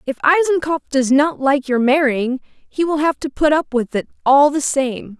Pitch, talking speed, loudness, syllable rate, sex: 280 Hz, 210 wpm, -17 LUFS, 5.3 syllables/s, female